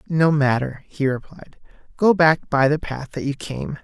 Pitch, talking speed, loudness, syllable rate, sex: 145 Hz, 190 wpm, -20 LUFS, 4.3 syllables/s, male